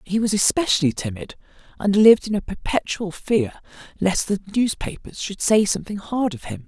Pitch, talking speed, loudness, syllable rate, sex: 205 Hz, 170 wpm, -21 LUFS, 5.4 syllables/s, female